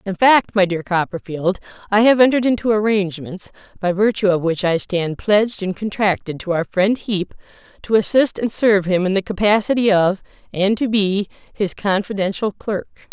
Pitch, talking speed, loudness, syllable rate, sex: 200 Hz, 165 wpm, -18 LUFS, 5.2 syllables/s, female